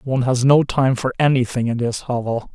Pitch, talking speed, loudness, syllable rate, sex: 125 Hz, 210 wpm, -18 LUFS, 5.4 syllables/s, male